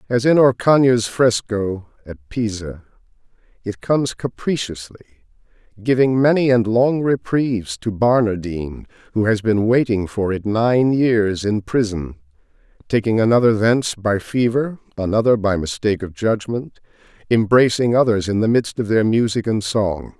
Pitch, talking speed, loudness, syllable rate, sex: 110 Hz, 135 wpm, -18 LUFS, 4.6 syllables/s, male